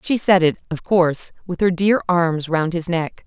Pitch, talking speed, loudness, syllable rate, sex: 175 Hz, 220 wpm, -19 LUFS, 4.6 syllables/s, female